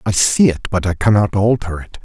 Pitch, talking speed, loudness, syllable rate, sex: 100 Hz, 235 wpm, -15 LUFS, 5.4 syllables/s, male